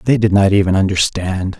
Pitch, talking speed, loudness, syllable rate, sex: 100 Hz, 190 wpm, -14 LUFS, 5.2 syllables/s, male